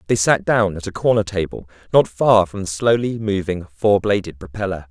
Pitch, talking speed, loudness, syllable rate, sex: 100 Hz, 195 wpm, -19 LUFS, 5.2 syllables/s, male